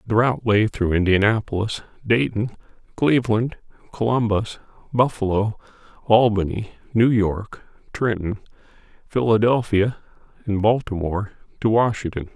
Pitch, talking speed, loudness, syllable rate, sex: 110 Hz, 85 wpm, -21 LUFS, 4.7 syllables/s, male